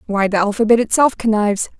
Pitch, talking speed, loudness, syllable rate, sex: 215 Hz, 165 wpm, -16 LUFS, 6.4 syllables/s, female